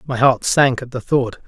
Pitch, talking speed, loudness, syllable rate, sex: 125 Hz, 245 wpm, -17 LUFS, 4.4 syllables/s, male